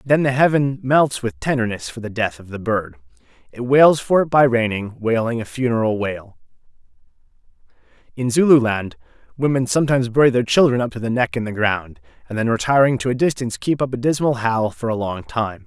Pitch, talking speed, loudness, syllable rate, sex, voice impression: 120 Hz, 195 wpm, -19 LUFS, 5.7 syllables/s, male, very masculine, very adult-like, middle-aged, thick, tensed, powerful, bright, slightly hard, very clear, very fluent, cool, very intellectual, refreshing, sincere, calm, mature, very friendly, very reassuring, slightly unique, elegant, slightly wild, very lively, slightly kind, intense